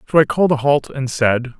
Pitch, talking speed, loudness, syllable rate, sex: 135 Hz, 265 wpm, -17 LUFS, 5.8 syllables/s, male